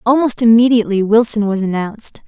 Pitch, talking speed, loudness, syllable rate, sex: 220 Hz, 130 wpm, -13 LUFS, 6.1 syllables/s, female